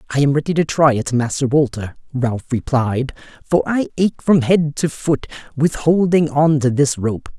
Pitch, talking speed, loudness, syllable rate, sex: 145 Hz, 185 wpm, -17 LUFS, 4.5 syllables/s, male